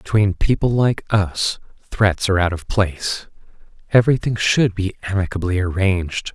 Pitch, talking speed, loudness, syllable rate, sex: 100 Hz, 130 wpm, -19 LUFS, 4.9 syllables/s, male